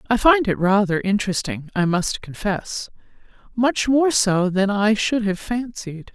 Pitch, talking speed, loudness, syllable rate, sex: 210 Hz, 155 wpm, -20 LUFS, 4.1 syllables/s, female